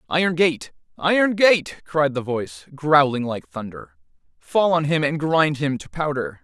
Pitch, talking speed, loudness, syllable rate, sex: 155 Hz, 170 wpm, -20 LUFS, 4.4 syllables/s, male